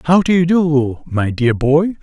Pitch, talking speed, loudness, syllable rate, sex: 150 Hz, 210 wpm, -15 LUFS, 4.0 syllables/s, male